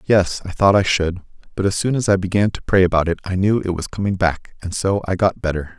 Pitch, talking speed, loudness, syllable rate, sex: 95 Hz, 270 wpm, -19 LUFS, 5.8 syllables/s, male